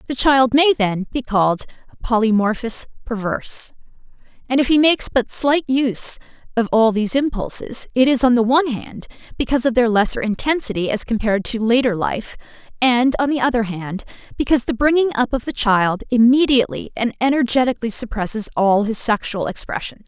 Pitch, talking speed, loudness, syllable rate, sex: 240 Hz, 165 wpm, -18 LUFS, 5.7 syllables/s, female